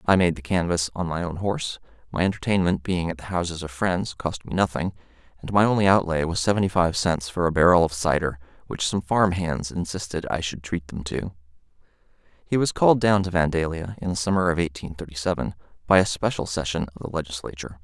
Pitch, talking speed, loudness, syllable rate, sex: 85 Hz, 210 wpm, -24 LUFS, 6.0 syllables/s, male